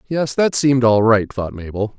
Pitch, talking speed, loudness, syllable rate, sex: 120 Hz, 180 wpm, -17 LUFS, 5.0 syllables/s, male